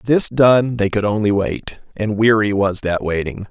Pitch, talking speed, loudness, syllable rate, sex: 105 Hz, 190 wpm, -17 LUFS, 4.2 syllables/s, male